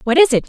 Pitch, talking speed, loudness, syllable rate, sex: 285 Hz, 375 wpm, -14 LUFS, 7.1 syllables/s, female